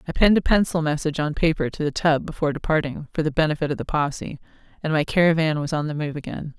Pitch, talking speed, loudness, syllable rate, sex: 155 Hz, 235 wpm, -22 LUFS, 7.1 syllables/s, female